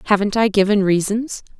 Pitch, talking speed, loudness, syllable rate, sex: 205 Hz, 150 wpm, -17 LUFS, 5.6 syllables/s, female